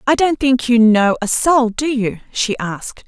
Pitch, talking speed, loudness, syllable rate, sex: 240 Hz, 215 wpm, -15 LUFS, 4.3 syllables/s, female